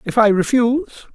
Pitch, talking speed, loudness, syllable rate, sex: 240 Hz, 155 wpm, -16 LUFS, 6.2 syllables/s, male